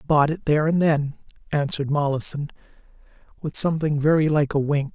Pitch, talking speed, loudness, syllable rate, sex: 150 Hz, 160 wpm, -22 LUFS, 5.9 syllables/s, male